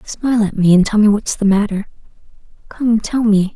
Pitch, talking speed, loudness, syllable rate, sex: 210 Hz, 205 wpm, -15 LUFS, 5.3 syllables/s, female